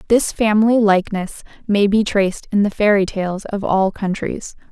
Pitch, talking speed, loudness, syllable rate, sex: 205 Hz, 165 wpm, -17 LUFS, 4.9 syllables/s, female